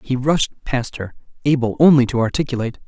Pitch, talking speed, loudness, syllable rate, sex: 130 Hz, 165 wpm, -18 LUFS, 5.8 syllables/s, male